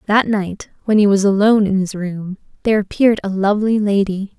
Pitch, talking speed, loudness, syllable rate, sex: 200 Hz, 190 wpm, -16 LUFS, 5.8 syllables/s, female